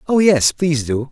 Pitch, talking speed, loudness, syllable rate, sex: 150 Hz, 215 wpm, -16 LUFS, 5.3 syllables/s, male